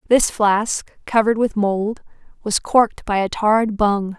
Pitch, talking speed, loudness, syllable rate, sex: 215 Hz, 160 wpm, -18 LUFS, 4.3 syllables/s, female